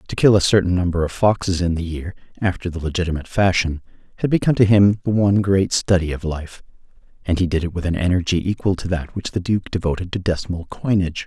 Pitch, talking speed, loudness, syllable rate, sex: 90 Hz, 215 wpm, -20 LUFS, 6.5 syllables/s, male